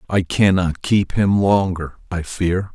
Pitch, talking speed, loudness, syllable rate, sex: 95 Hz, 155 wpm, -18 LUFS, 3.8 syllables/s, male